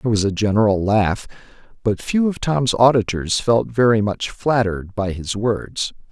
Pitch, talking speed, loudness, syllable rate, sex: 110 Hz, 165 wpm, -19 LUFS, 4.7 syllables/s, male